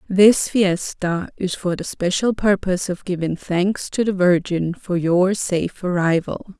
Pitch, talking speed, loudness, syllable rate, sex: 185 Hz, 155 wpm, -20 LUFS, 4.1 syllables/s, female